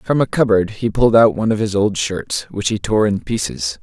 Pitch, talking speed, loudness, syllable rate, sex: 105 Hz, 250 wpm, -17 LUFS, 5.3 syllables/s, male